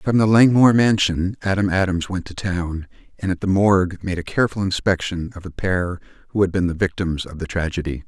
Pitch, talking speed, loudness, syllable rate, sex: 95 Hz, 210 wpm, -20 LUFS, 5.6 syllables/s, male